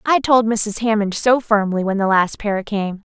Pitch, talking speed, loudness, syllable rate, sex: 215 Hz, 210 wpm, -18 LUFS, 4.4 syllables/s, female